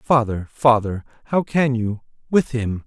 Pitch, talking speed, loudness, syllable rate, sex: 120 Hz, 125 wpm, -20 LUFS, 3.9 syllables/s, male